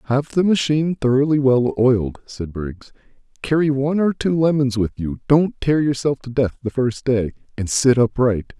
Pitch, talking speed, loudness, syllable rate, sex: 130 Hz, 180 wpm, -19 LUFS, 4.9 syllables/s, male